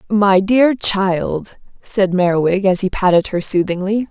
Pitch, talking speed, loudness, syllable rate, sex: 195 Hz, 145 wpm, -15 LUFS, 4.1 syllables/s, female